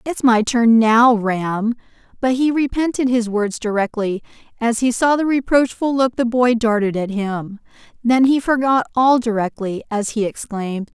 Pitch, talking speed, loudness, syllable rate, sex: 235 Hz, 165 wpm, -18 LUFS, 4.5 syllables/s, female